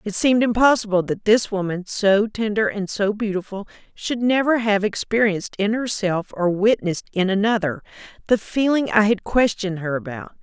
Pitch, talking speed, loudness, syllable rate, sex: 210 Hz, 160 wpm, -20 LUFS, 5.3 syllables/s, female